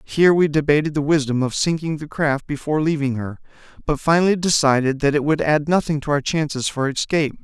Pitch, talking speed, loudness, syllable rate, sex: 150 Hz, 200 wpm, -19 LUFS, 6.0 syllables/s, male